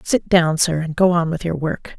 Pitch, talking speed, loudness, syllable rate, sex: 170 Hz, 270 wpm, -18 LUFS, 4.8 syllables/s, female